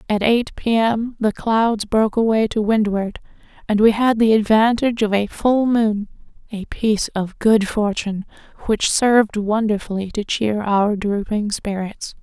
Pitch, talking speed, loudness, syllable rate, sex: 215 Hz, 150 wpm, -18 LUFS, 4.4 syllables/s, female